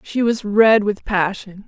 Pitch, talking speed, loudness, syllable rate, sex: 205 Hz, 180 wpm, -17 LUFS, 3.8 syllables/s, female